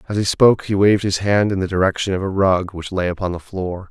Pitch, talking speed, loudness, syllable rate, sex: 95 Hz, 275 wpm, -18 LUFS, 6.2 syllables/s, male